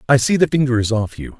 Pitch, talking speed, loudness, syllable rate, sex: 120 Hz, 300 wpm, -17 LUFS, 6.6 syllables/s, male